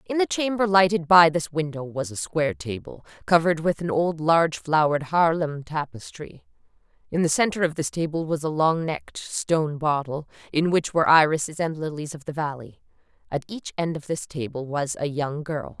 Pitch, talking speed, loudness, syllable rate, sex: 155 Hz, 190 wpm, -23 LUFS, 5.3 syllables/s, female